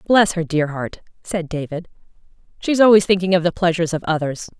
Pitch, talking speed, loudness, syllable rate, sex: 175 Hz, 195 wpm, -18 LUFS, 6.2 syllables/s, female